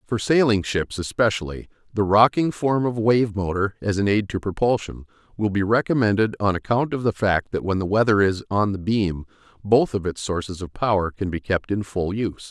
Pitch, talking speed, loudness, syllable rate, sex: 105 Hz, 205 wpm, -22 LUFS, 5.3 syllables/s, male